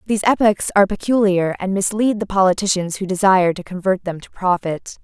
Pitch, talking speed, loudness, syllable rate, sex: 190 Hz, 180 wpm, -18 LUFS, 5.9 syllables/s, female